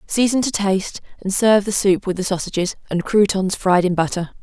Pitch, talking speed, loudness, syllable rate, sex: 195 Hz, 205 wpm, -19 LUFS, 5.6 syllables/s, female